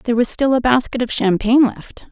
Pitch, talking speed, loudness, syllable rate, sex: 240 Hz, 225 wpm, -16 LUFS, 5.8 syllables/s, female